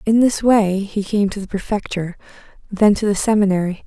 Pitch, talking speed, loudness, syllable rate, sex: 200 Hz, 185 wpm, -18 LUFS, 5.6 syllables/s, female